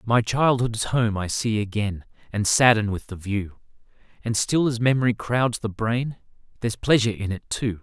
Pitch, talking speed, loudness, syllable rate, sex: 110 Hz, 175 wpm, -23 LUFS, 4.9 syllables/s, male